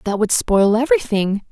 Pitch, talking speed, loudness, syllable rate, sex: 205 Hz, 160 wpm, -17 LUFS, 5.2 syllables/s, female